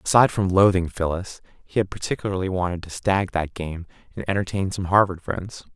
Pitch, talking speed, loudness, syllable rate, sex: 90 Hz, 175 wpm, -23 LUFS, 5.6 syllables/s, male